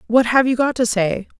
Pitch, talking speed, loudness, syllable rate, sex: 235 Hz, 255 wpm, -17 LUFS, 5.3 syllables/s, female